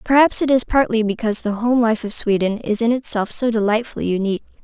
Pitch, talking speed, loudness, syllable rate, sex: 225 Hz, 205 wpm, -18 LUFS, 6.2 syllables/s, female